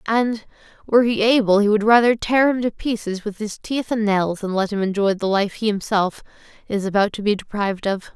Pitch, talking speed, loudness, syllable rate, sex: 210 Hz, 220 wpm, -20 LUFS, 5.5 syllables/s, female